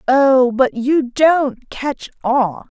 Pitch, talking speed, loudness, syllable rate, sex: 265 Hz, 130 wpm, -16 LUFS, 2.5 syllables/s, female